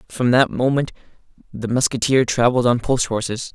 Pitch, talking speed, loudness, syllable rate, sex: 125 Hz, 150 wpm, -18 LUFS, 5.4 syllables/s, male